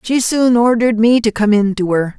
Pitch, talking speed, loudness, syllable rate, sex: 225 Hz, 245 wpm, -13 LUFS, 5.3 syllables/s, female